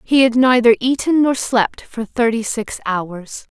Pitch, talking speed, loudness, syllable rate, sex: 235 Hz, 170 wpm, -16 LUFS, 3.9 syllables/s, female